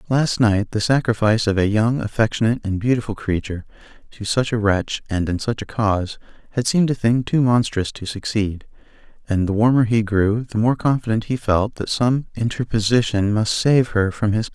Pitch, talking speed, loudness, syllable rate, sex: 110 Hz, 195 wpm, -20 LUFS, 5.5 syllables/s, male